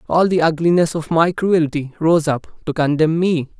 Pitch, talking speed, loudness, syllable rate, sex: 160 Hz, 185 wpm, -17 LUFS, 4.7 syllables/s, male